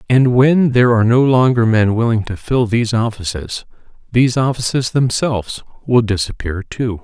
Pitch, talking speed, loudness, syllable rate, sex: 115 Hz, 155 wpm, -15 LUFS, 5.2 syllables/s, male